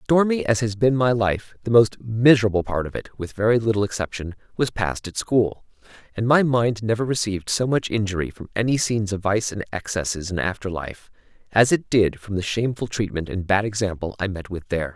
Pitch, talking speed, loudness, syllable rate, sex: 105 Hz, 210 wpm, -22 LUFS, 5.3 syllables/s, male